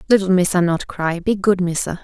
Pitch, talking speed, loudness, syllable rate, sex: 180 Hz, 205 wpm, -18 LUFS, 5.5 syllables/s, female